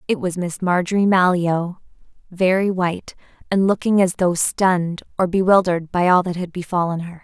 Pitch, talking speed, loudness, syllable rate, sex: 180 Hz, 165 wpm, -19 LUFS, 5.2 syllables/s, female